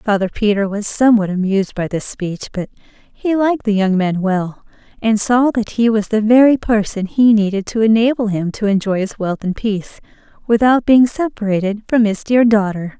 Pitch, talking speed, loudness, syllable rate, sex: 215 Hz, 190 wpm, -16 LUFS, 5.2 syllables/s, female